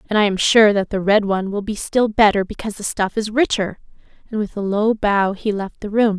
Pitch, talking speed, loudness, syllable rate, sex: 205 Hz, 250 wpm, -18 LUFS, 5.6 syllables/s, female